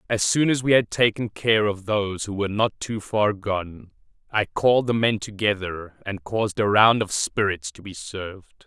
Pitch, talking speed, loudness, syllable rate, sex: 105 Hz, 200 wpm, -22 LUFS, 4.8 syllables/s, male